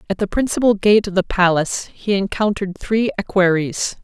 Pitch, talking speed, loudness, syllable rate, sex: 195 Hz, 165 wpm, -18 LUFS, 5.4 syllables/s, female